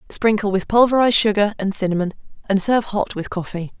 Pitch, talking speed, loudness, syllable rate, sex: 205 Hz, 175 wpm, -19 LUFS, 6.2 syllables/s, female